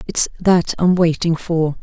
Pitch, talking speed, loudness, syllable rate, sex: 170 Hz, 165 wpm, -17 LUFS, 4.1 syllables/s, female